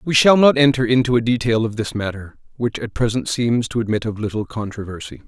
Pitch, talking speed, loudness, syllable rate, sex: 115 Hz, 215 wpm, -19 LUFS, 5.8 syllables/s, male